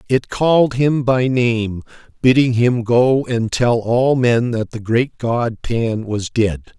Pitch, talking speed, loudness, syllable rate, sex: 120 Hz, 170 wpm, -17 LUFS, 3.4 syllables/s, male